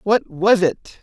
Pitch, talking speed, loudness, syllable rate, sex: 200 Hz, 175 wpm, -18 LUFS, 3.2 syllables/s, male